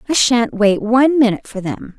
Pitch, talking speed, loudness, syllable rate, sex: 230 Hz, 210 wpm, -15 LUFS, 5.6 syllables/s, female